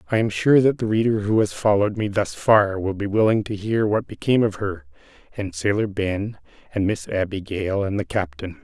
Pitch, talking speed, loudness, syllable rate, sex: 105 Hz, 210 wpm, -22 LUFS, 5.3 syllables/s, male